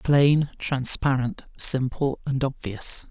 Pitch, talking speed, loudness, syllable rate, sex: 135 Hz, 95 wpm, -23 LUFS, 3.3 syllables/s, male